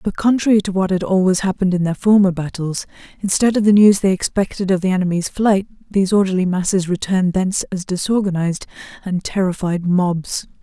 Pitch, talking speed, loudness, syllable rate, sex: 190 Hz, 175 wpm, -17 LUFS, 6.0 syllables/s, female